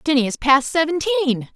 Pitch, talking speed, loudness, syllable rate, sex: 295 Hz, 155 wpm, -18 LUFS, 6.9 syllables/s, female